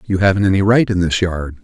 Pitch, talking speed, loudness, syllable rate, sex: 95 Hz, 255 wpm, -15 LUFS, 6.1 syllables/s, male